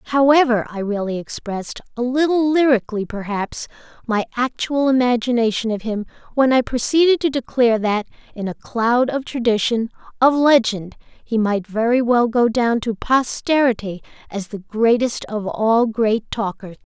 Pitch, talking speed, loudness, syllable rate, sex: 235 Hz, 145 wpm, -19 LUFS, 4.7 syllables/s, female